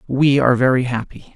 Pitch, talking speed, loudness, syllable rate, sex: 130 Hz, 180 wpm, -16 LUFS, 5.9 syllables/s, male